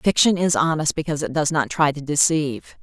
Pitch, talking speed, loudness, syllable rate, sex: 155 Hz, 215 wpm, -20 LUFS, 5.8 syllables/s, female